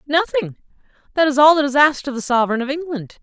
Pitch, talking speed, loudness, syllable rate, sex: 275 Hz, 205 wpm, -17 LUFS, 6.9 syllables/s, female